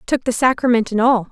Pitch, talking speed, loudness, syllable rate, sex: 235 Hz, 230 wpm, -17 LUFS, 5.9 syllables/s, female